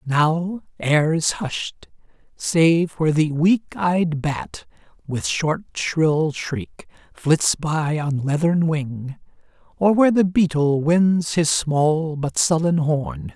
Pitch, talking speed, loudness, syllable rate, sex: 160 Hz, 130 wpm, -20 LUFS, 3.0 syllables/s, male